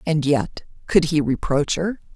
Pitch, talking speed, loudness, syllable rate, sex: 155 Hz, 165 wpm, -21 LUFS, 4.1 syllables/s, female